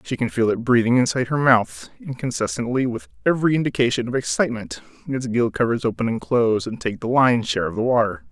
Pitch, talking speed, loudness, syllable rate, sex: 120 Hz, 200 wpm, -21 LUFS, 6.3 syllables/s, male